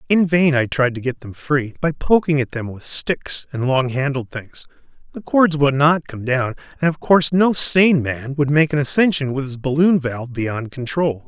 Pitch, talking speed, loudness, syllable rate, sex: 145 Hz, 215 wpm, -18 LUFS, 4.7 syllables/s, male